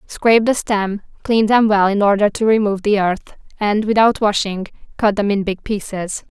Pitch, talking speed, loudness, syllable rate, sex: 205 Hz, 190 wpm, -16 LUFS, 4.9 syllables/s, female